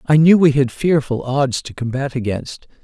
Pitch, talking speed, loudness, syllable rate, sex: 135 Hz, 190 wpm, -17 LUFS, 4.6 syllables/s, male